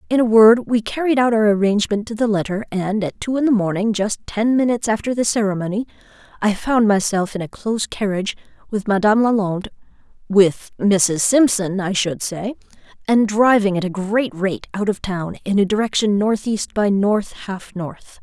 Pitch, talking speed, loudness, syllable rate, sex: 210 Hz, 180 wpm, -18 LUFS, 5.2 syllables/s, female